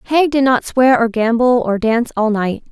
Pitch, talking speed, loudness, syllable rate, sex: 240 Hz, 220 wpm, -15 LUFS, 4.7 syllables/s, female